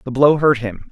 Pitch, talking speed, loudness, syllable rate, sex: 130 Hz, 260 wpm, -15 LUFS, 5.7 syllables/s, male